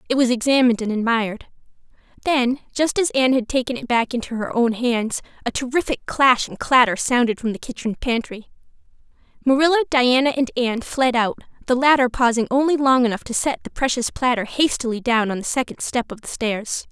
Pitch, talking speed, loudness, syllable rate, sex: 245 Hz, 190 wpm, -20 LUFS, 5.7 syllables/s, female